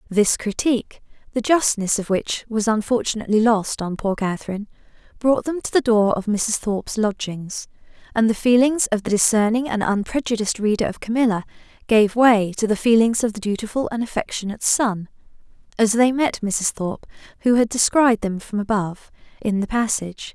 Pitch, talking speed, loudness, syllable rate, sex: 220 Hz, 170 wpm, -20 LUFS, 5.5 syllables/s, female